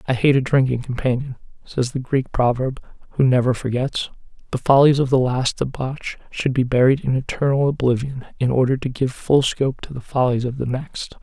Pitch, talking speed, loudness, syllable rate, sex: 130 Hz, 190 wpm, -20 LUFS, 5.4 syllables/s, male